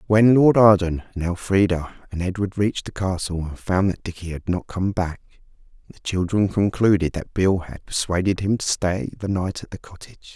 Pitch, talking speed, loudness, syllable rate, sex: 95 Hz, 190 wpm, -21 LUFS, 5.2 syllables/s, male